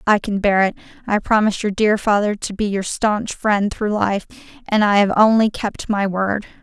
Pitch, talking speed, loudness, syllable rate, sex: 205 Hz, 210 wpm, -18 LUFS, 4.8 syllables/s, female